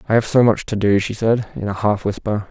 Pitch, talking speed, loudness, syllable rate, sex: 105 Hz, 285 wpm, -18 LUFS, 5.7 syllables/s, male